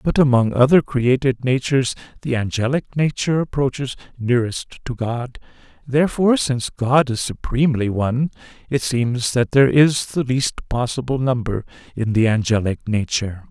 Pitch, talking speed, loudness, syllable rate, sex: 125 Hz, 140 wpm, -19 LUFS, 5.2 syllables/s, male